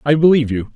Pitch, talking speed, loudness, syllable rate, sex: 140 Hz, 240 wpm, -15 LUFS, 7.7 syllables/s, male